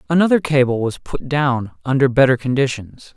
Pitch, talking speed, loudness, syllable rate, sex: 135 Hz, 150 wpm, -17 LUFS, 5.2 syllables/s, male